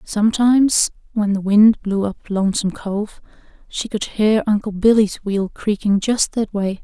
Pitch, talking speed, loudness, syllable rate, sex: 210 Hz, 160 wpm, -18 LUFS, 4.5 syllables/s, female